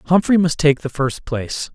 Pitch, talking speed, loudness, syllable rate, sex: 155 Hz, 205 wpm, -18 LUFS, 4.7 syllables/s, male